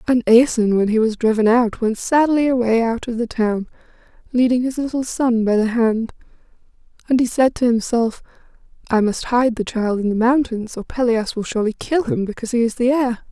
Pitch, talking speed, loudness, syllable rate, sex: 235 Hz, 205 wpm, -18 LUFS, 5.4 syllables/s, female